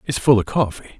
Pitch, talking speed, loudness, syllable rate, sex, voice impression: 115 Hz, 240 wpm, -18 LUFS, 6.5 syllables/s, male, masculine, adult-like, slightly thick, cool, calm, slightly wild